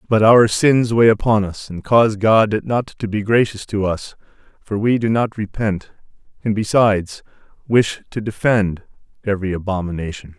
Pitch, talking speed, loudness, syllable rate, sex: 105 Hz, 155 wpm, -17 LUFS, 4.8 syllables/s, male